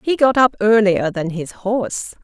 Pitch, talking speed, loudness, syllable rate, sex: 215 Hz, 190 wpm, -17 LUFS, 4.6 syllables/s, female